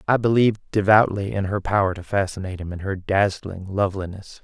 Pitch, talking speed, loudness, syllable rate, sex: 100 Hz, 175 wpm, -22 LUFS, 6.0 syllables/s, male